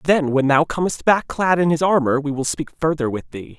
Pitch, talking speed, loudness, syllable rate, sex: 155 Hz, 250 wpm, -19 LUFS, 5.3 syllables/s, male